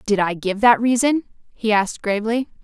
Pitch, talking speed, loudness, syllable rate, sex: 220 Hz, 180 wpm, -19 LUFS, 5.6 syllables/s, female